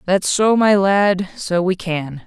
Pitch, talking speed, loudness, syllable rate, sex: 190 Hz, 185 wpm, -17 LUFS, 3.4 syllables/s, female